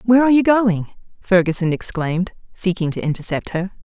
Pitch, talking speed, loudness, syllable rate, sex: 195 Hz, 155 wpm, -19 LUFS, 6.0 syllables/s, female